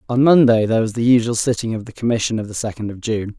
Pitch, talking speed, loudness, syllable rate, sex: 115 Hz, 265 wpm, -18 LUFS, 6.9 syllables/s, male